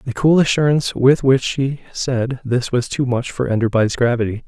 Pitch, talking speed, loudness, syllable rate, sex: 125 Hz, 190 wpm, -17 LUFS, 5.0 syllables/s, male